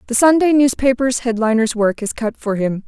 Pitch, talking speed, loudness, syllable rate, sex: 240 Hz, 190 wpm, -16 LUFS, 5.2 syllables/s, female